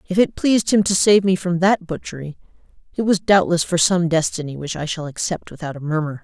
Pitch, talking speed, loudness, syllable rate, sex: 175 Hz, 220 wpm, -19 LUFS, 5.8 syllables/s, female